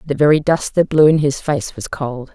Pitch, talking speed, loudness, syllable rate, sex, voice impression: 145 Hz, 255 wpm, -16 LUFS, 5.1 syllables/s, female, slightly feminine, adult-like, intellectual, calm